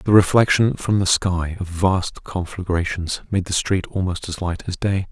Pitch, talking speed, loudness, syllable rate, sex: 95 Hz, 190 wpm, -21 LUFS, 4.5 syllables/s, male